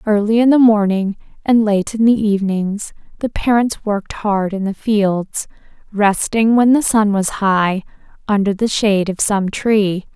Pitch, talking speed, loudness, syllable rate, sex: 210 Hz, 165 wpm, -16 LUFS, 4.3 syllables/s, female